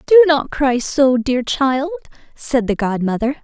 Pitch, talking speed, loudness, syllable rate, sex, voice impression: 270 Hz, 155 wpm, -16 LUFS, 4.0 syllables/s, female, very feminine, young, very thin, very tensed, powerful, very bright, soft, very clear, fluent, very cute, intellectual, very refreshing, sincere, slightly calm, very friendly, very reassuring, very unique, slightly elegant, slightly wild, very sweet, slightly strict, intense, slightly sharp, light